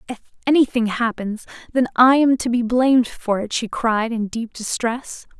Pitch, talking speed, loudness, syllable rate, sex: 235 Hz, 180 wpm, -19 LUFS, 4.6 syllables/s, female